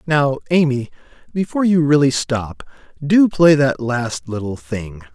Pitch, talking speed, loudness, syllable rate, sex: 135 Hz, 140 wpm, -17 LUFS, 4.2 syllables/s, male